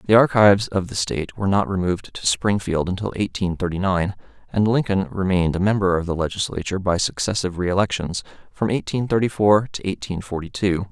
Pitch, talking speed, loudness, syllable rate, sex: 95 Hz, 180 wpm, -21 LUFS, 5.9 syllables/s, male